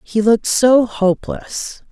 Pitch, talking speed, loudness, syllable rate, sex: 225 Hz, 125 wpm, -16 LUFS, 4.0 syllables/s, female